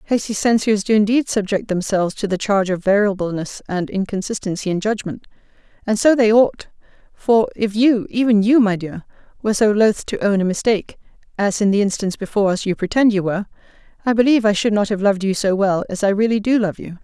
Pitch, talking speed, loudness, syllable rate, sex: 205 Hz, 210 wpm, -18 LUFS, 6.2 syllables/s, female